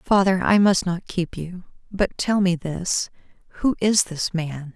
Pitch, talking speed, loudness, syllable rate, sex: 185 Hz, 165 wpm, -21 LUFS, 3.9 syllables/s, female